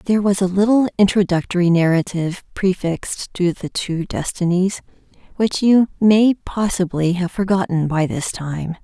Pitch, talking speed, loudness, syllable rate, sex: 185 Hz, 135 wpm, -18 LUFS, 4.8 syllables/s, female